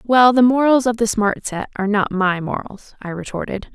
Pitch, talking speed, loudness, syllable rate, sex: 220 Hz, 210 wpm, -18 LUFS, 5.1 syllables/s, female